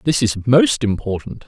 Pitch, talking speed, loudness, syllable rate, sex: 120 Hz, 165 wpm, -17 LUFS, 4.7 syllables/s, male